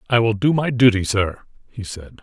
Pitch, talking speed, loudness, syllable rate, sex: 110 Hz, 215 wpm, -18 LUFS, 5.3 syllables/s, male